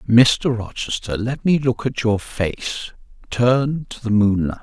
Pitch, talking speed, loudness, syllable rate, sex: 115 Hz, 155 wpm, -20 LUFS, 3.9 syllables/s, male